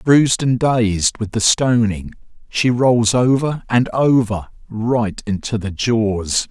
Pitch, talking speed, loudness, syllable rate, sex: 115 Hz, 140 wpm, -17 LUFS, 3.5 syllables/s, male